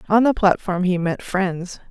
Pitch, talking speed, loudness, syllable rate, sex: 190 Hz, 190 wpm, -20 LUFS, 4.3 syllables/s, female